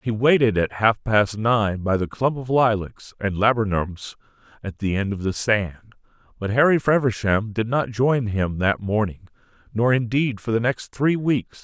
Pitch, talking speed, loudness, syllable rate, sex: 110 Hz, 180 wpm, -21 LUFS, 4.4 syllables/s, male